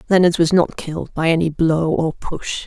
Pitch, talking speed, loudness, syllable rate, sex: 165 Hz, 205 wpm, -18 LUFS, 4.9 syllables/s, female